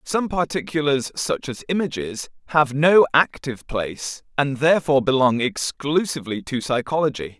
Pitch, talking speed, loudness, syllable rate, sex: 140 Hz, 120 wpm, -21 LUFS, 5.0 syllables/s, male